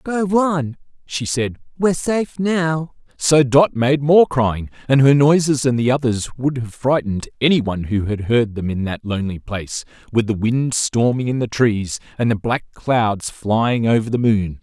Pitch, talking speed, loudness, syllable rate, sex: 125 Hz, 185 wpm, -18 LUFS, 4.5 syllables/s, male